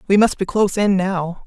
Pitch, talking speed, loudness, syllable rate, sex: 195 Hz, 245 wpm, -18 LUFS, 5.5 syllables/s, female